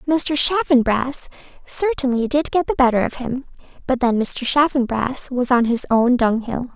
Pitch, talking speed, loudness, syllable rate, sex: 260 Hz, 160 wpm, -19 LUFS, 4.6 syllables/s, female